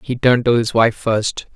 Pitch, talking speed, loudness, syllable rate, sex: 115 Hz, 230 wpm, -16 LUFS, 5.0 syllables/s, male